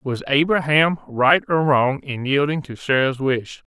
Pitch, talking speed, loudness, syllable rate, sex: 140 Hz, 160 wpm, -19 LUFS, 4.1 syllables/s, male